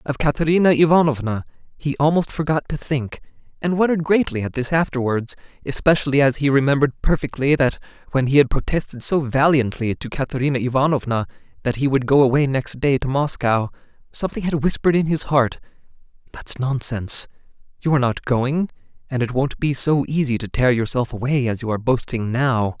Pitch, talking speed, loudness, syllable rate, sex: 135 Hz, 170 wpm, -20 LUFS, 5.9 syllables/s, male